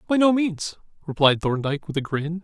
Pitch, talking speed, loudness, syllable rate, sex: 165 Hz, 195 wpm, -22 LUFS, 5.7 syllables/s, male